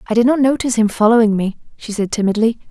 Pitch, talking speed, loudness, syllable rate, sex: 225 Hz, 220 wpm, -15 LUFS, 7.1 syllables/s, female